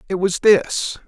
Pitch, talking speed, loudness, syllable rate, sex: 190 Hz, 165 wpm, -17 LUFS, 3.8 syllables/s, male